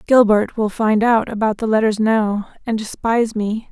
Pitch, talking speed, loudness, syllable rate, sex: 220 Hz, 180 wpm, -18 LUFS, 4.7 syllables/s, female